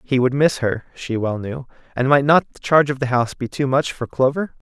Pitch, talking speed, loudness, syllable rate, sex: 135 Hz, 255 wpm, -19 LUFS, 5.7 syllables/s, male